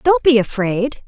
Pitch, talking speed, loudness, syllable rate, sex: 255 Hz, 170 wpm, -16 LUFS, 4.2 syllables/s, female